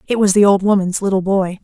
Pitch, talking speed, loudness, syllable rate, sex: 195 Hz, 255 wpm, -15 LUFS, 6.0 syllables/s, female